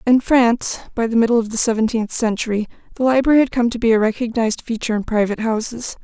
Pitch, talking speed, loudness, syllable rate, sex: 230 Hz, 210 wpm, -18 LUFS, 6.8 syllables/s, female